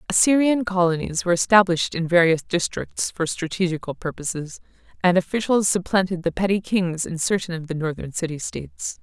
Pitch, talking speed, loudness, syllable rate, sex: 180 Hz, 155 wpm, -22 LUFS, 5.6 syllables/s, female